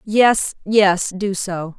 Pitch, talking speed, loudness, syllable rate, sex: 195 Hz, 135 wpm, -17 LUFS, 2.6 syllables/s, female